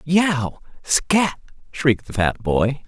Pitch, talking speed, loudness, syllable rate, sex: 140 Hz, 125 wpm, -20 LUFS, 3.1 syllables/s, male